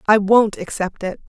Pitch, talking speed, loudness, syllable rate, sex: 205 Hz, 175 wpm, -18 LUFS, 4.7 syllables/s, female